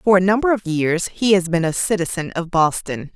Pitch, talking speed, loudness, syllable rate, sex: 180 Hz, 230 wpm, -19 LUFS, 5.3 syllables/s, female